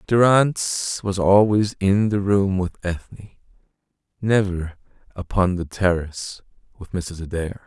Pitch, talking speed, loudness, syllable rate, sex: 95 Hz, 115 wpm, -21 LUFS, 4.0 syllables/s, male